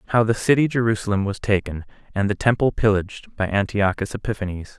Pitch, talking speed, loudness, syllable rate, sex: 105 Hz, 165 wpm, -21 LUFS, 4.9 syllables/s, male